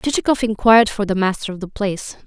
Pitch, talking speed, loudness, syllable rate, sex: 210 Hz, 210 wpm, -17 LUFS, 6.7 syllables/s, female